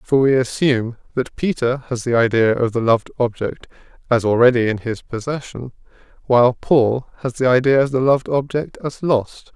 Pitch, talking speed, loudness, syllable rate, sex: 125 Hz, 175 wpm, -18 LUFS, 5.2 syllables/s, male